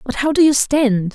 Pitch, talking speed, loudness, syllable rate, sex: 260 Hz, 265 wpm, -15 LUFS, 4.8 syllables/s, female